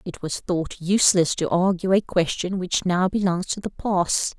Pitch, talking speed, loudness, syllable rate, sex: 180 Hz, 190 wpm, -22 LUFS, 4.5 syllables/s, female